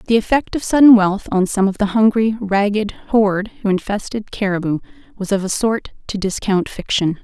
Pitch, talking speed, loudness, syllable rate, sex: 205 Hz, 180 wpm, -17 LUFS, 5.3 syllables/s, female